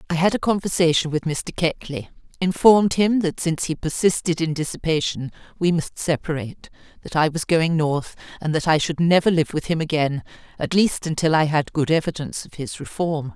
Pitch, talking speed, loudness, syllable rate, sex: 160 Hz, 190 wpm, -21 LUFS, 5.5 syllables/s, female